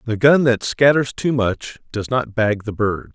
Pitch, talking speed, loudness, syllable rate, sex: 115 Hz, 210 wpm, -18 LUFS, 4.2 syllables/s, male